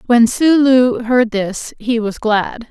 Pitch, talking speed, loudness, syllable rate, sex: 235 Hz, 175 wpm, -14 LUFS, 3.2 syllables/s, female